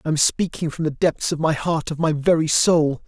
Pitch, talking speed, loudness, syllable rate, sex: 155 Hz, 235 wpm, -20 LUFS, 5.1 syllables/s, male